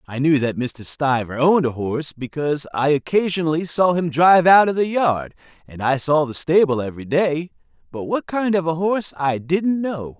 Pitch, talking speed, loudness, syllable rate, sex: 155 Hz, 195 wpm, -19 LUFS, 5.2 syllables/s, male